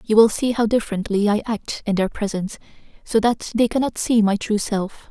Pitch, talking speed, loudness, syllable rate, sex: 215 Hz, 210 wpm, -20 LUFS, 5.4 syllables/s, female